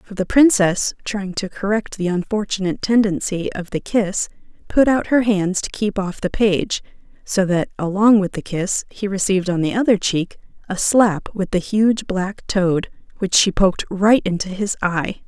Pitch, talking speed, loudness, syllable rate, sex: 195 Hz, 185 wpm, -19 LUFS, 4.6 syllables/s, female